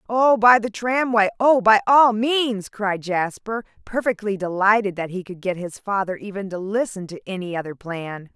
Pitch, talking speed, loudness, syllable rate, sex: 205 Hz, 180 wpm, -21 LUFS, 4.7 syllables/s, female